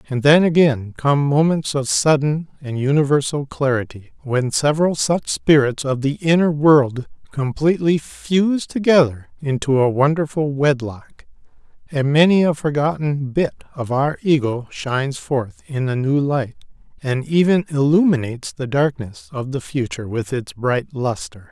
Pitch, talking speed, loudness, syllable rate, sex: 140 Hz, 140 wpm, -18 LUFS, 4.5 syllables/s, male